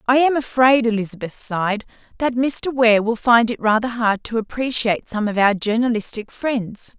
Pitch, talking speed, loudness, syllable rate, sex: 230 Hz, 170 wpm, -19 LUFS, 5.0 syllables/s, female